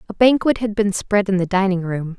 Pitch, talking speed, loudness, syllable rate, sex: 200 Hz, 245 wpm, -18 LUFS, 5.5 syllables/s, female